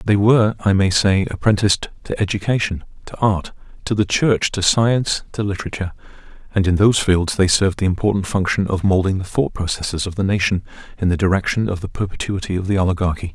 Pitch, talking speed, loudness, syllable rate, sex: 95 Hz, 195 wpm, -18 LUFS, 6.2 syllables/s, male